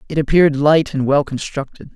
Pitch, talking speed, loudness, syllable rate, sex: 145 Hz, 185 wpm, -16 LUFS, 5.7 syllables/s, male